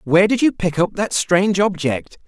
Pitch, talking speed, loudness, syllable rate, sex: 185 Hz, 210 wpm, -18 LUFS, 5.2 syllables/s, male